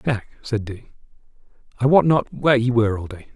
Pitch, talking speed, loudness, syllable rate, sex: 120 Hz, 195 wpm, -20 LUFS, 5.9 syllables/s, male